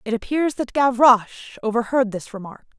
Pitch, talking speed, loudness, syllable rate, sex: 240 Hz, 150 wpm, -19 LUFS, 5.1 syllables/s, female